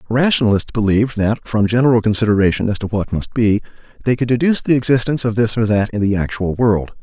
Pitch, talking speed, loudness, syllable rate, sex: 110 Hz, 205 wpm, -16 LUFS, 6.5 syllables/s, male